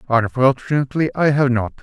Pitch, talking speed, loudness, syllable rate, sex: 130 Hz, 130 wpm, -18 LUFS, 5.8 syllables/s, male